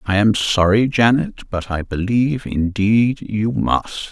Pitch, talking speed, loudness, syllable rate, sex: 110 Hz, 145 wpm, -18 LUFS, 3.9 syllables/s, male